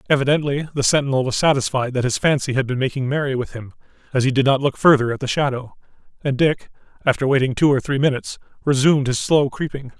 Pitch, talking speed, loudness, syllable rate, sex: 135 Hz, 210 wpm, -19 LUFS, 6.6 syllables/s, male